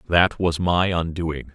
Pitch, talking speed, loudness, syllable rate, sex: 85 Hz, 155 wpm, -21 LUFS, 3.6 syllables/s, male